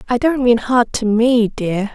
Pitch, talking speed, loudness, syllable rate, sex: 235 Hz, 215 wpm, -16 LUFS, 4.0 syllables/s, female